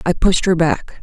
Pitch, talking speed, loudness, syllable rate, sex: 170 Hz, 235 wpm, -16 LUFS, 4.6 syllables/s, female